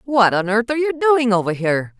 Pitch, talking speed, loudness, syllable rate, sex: 230 Hz, 240 wpm, -17 LUFS, 6.0 syllables/s, female